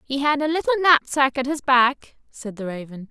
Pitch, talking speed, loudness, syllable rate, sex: 270 Hz, 210 wpm, -20 LUFS, 4.9 syllables/s, female